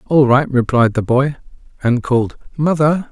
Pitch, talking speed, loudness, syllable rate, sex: 135 Hz, 155 wpm, -16 LUFS, 4.7 syllables/s, male